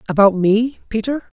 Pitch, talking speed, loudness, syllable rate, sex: 200 Hz, 130 wpm, -17 LUFS, 4.7 syllables/s, male